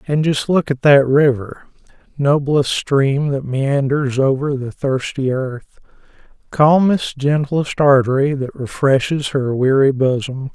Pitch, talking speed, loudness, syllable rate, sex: 140 Hz, 115 wpm, -16 LUFS, 3.9 syllables/s, male